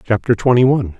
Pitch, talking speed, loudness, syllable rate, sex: 115 Hz, 180 wpm, -14 LUFS, 7.2 syllables/s, male